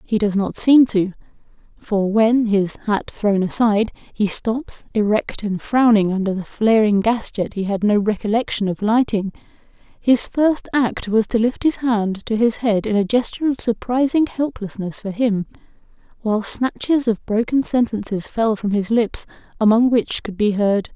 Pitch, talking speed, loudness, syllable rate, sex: 220 Hz, 170 wpm, -19 LUFS, 4.5 syllables/s, female